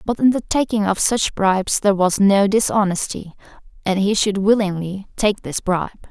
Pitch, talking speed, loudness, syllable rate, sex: 200 Hz, 175 wpm, -18 LUFS, 5.1 syllables/s, female